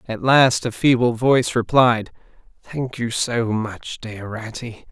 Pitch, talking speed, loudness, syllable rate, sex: 115 Hz, 145 wpm, -19 LUFS, 3.9 syllables/s, male